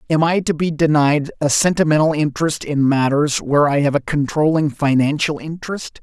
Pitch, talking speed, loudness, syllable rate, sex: 150 Hz, 170 wpm, -17 LUFS, 5.4 syllables/s, male